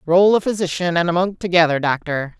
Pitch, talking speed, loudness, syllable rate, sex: 175 Hz, 200 wpm, -18 LUFS, 5.7 syllables/s, female